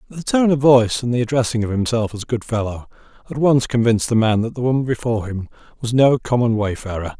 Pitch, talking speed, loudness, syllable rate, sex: 120 Hz, 215 wpm, -18 LUFS, 6.2 syllables/s, male